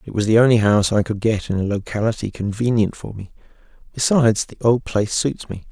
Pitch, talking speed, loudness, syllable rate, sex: 110 Hz, 210 wpm, -19 LUFS, 6.0 syllables/s, male